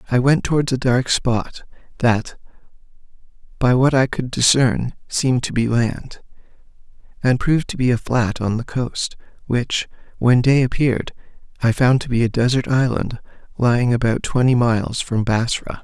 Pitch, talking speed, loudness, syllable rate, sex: 125 Hz, 160 wpm, -19 LUFS, 4.9 syllables/s, male